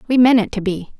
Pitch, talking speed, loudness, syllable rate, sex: 220 Hz, 300 wpm, -16 LUFS, 6.5 syllables/s, female